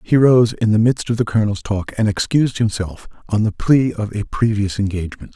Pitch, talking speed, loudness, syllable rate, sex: 110 Hz, 215 wpm, -18 LUFS, 5.6 syllables/s, male